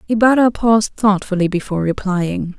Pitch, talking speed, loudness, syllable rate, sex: 200 Hz, 115 wpm, -16 LUFS, 5.5 syllables/s, female